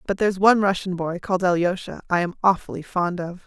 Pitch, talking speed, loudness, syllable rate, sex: 185 Hz, 210 wpm, -22 LUFS, 6.4 syllables/s, female